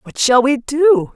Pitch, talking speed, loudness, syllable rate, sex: 270 Hz, 210 wpm, -14 LUFS, 3.8 syllables/s, female